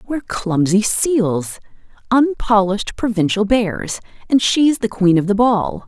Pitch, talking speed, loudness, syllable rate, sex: 215 Hz, 135 wpm, -17 LUFS, 4.2 syllables/s, female